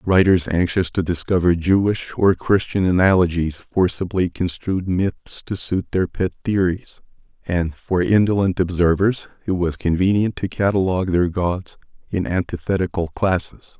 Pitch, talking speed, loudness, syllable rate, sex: 90 Hz, 130 wpm, -20 LUFS, 4.7 syllables/s, male